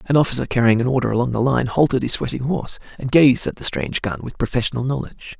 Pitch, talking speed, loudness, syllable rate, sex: 130 Hz, 235 wpm, -19 LUFS, 6.9 syllables/s, male